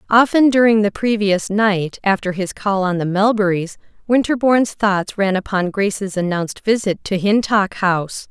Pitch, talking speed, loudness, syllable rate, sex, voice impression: 200 Hz, 150 wpm, -17 LUFS, 4.8 syllables/s, female, very feminine, slightly middle-aged, slightly powerful, intellectual, slightly strict